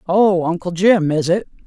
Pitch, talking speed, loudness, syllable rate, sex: 180 Hz, 180 wpm, -16 LUFS, 4.4 syllables/s, female